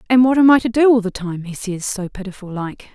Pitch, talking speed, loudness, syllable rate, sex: 210 Hz, 285 wpm, -17 LUFS, 5.9 syllables/s, female